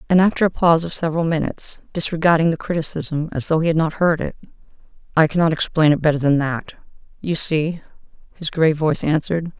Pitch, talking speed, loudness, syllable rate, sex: 160 Hz, 180 wpm, -19 LUFS, 6.5 syllables/s, female